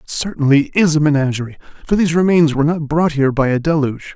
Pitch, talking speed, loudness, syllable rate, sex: 150 Hz, 215 wpm, -15 LUFS, 6.8 syllables/s, male